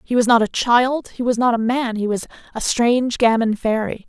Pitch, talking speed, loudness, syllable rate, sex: 235 Hz, 235 wpm, -18 LUFS, 5.2 syllables/s, female